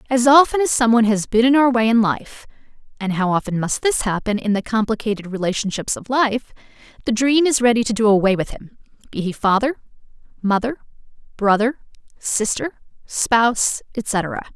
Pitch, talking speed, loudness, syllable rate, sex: 230 Hz, 155 wpm, -18 LUFS, 5.3 syllables/s, female